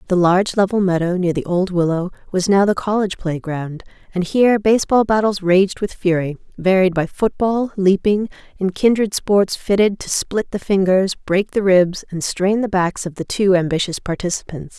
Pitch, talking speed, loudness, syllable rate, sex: 190 Hz, 180 wpm, -18 LUFS, 5.0 syllables/s, female